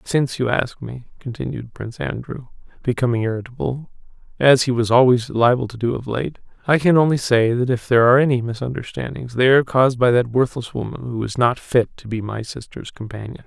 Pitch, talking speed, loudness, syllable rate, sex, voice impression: 125 Hz, 185 wpm, -19 LUFS, 6.0 syllables/s, male, very masculine, middle-aged, thick, slightly relaxed, powerful, bright, soft, clear, fluent, cool, very intellectual, very refreshing, sincere, slightly calm, friendly, reassuring, slightly unique, slightly elegant, wild, sweet, very lively, kind